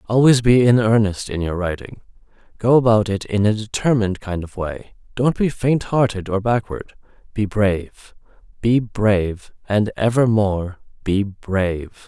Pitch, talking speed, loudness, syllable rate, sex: 105 Hz, 150 wpm, -19 LUFS, 4.6 syllables/s, male